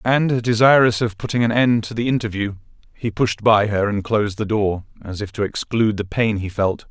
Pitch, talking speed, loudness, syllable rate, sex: 110 Hz, 215 wpm, -19 LUFS, 5.3 syllables/s, male